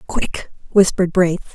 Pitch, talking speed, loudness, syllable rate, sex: 180 Hz, 115 wpm, -17 LUFS, 4.9 syllables/s, female